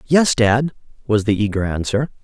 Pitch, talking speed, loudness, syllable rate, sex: 115 Hz, 160 wpm, -18 LUFS, 5.0 syllables/s, male